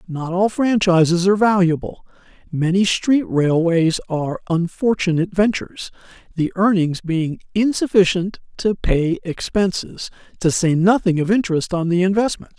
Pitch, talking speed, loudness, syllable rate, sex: 185 Hz, 125 wpm, -18 LUFS, 4.8 syllables/s, male